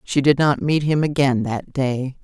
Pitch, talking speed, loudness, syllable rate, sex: 140 Hz, 215 wpm, -19 LUFS, 4.3 syllables/s, female